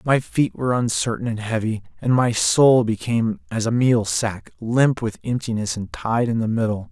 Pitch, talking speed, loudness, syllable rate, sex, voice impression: 115 Hz, 190 wpm, -21 LUFS, 4.9 syllables/s, male, masculine, adult-like, slightly fluent, cool, slightly refreshing